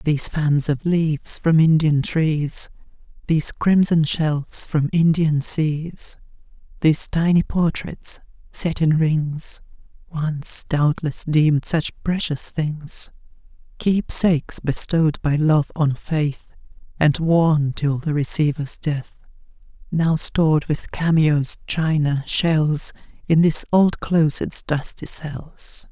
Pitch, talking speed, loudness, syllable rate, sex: 155 Hz, 115 wpm, -20 LUFS, 3.4 syllables/s, female